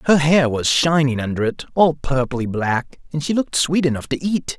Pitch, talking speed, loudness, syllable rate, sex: 145 Hz, 210 wpm, -19 LUFS, 5.0 syllables/s, male